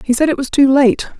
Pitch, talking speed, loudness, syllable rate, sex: 270 Hz, 305 wpm, -13 LUFS, 6.1 syllables/s, female